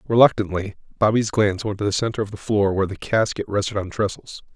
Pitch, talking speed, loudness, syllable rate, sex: 105 Hz, 210 wpm, -21 LUFS, 6.3 syllables/s, male